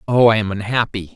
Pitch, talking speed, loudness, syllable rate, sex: 110 Hz, 210 wpm, -17 LUFS, 6.1 syllables/s, male